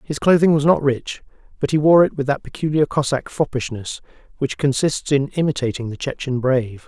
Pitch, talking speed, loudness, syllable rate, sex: 140 Hz, 185 wpm, -19 LUFS, 5.5 syllables/s, male